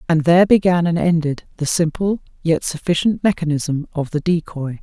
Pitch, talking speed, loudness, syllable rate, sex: 165 Hz, 160 wpm, -18 LUFS, 5.2 syllables/s, female